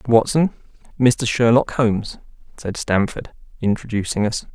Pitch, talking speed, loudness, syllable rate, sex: 115 Hz, 120 wpm, -19 LUFS, 4.8 syllables/s, male